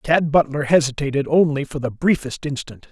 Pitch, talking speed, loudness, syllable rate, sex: 145 Hz, 165 wpm, -19 LUFS, 5.2 syllables/s, male